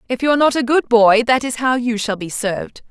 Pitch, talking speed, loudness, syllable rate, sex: 240 Hz, 270 wpm, -16 LUFS, 5.7 syllables/s, female